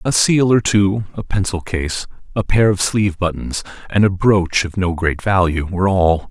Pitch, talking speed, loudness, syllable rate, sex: 95 Hz, 200 wpm, -17 LUFS, 4.7 syllables/s, male